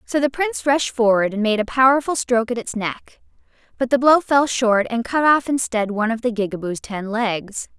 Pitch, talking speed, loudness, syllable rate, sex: 240 Hz, 215 wpm, -19 LUFS, 5.3 syllables/s, female